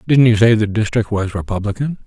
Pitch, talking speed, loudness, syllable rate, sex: 110 Hz, 205 wpm, -16 LUFS, 5.9 syllables/s, male